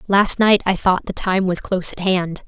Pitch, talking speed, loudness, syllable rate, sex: 190 Hz, 245 wpm, -18 LUFS, 4.9 syllables/s, female